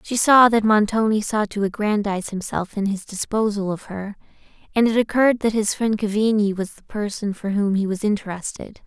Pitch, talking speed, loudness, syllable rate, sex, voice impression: 210 Hz, 190 wpm, -21 LUFS, 5.4 syllables/s, female, very feminine, slightly young, slightly adult-like, very thin, slightly tensed, slightly weak, slightly bright, soft, clear, fluent, very cute, intellectual, very refreshing, very sincere, very calm, very friendly, reassuring, very unique, elegant, slightly wild, kind, slightly modest